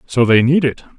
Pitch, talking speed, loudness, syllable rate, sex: 130 Hz, 245 wpm, -14 LUFS, 5.3 syllables/s, male